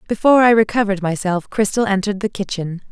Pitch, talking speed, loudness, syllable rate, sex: 205 Hz, 165 wpm, -17 LUFS, 6.7 syllables/s, female